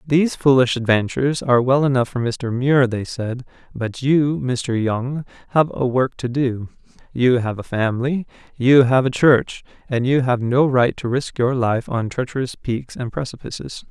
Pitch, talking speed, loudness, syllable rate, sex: 125 Hz, 180 wpm, -19 LUFS, 4.6 syllables/s, male